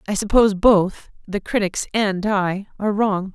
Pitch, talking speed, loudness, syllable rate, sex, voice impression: 200 Hz, 125 wpm, -19 LUFS, 4.6 syllables/s, female, feminine, adult-like, tensed, slightly bright, clear, fluent, intellectual, slightly friendly, elegant, slightly strict, slightly sharp